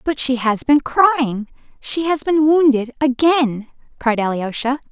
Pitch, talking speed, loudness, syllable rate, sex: 265 Hz, 135 wpm, -17 LUFS, 4.0 syllables/s, female